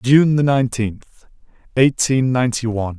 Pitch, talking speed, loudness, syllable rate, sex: 125 Hz, 100 wpm, -17 LUFS, 4.5 syllables/s, male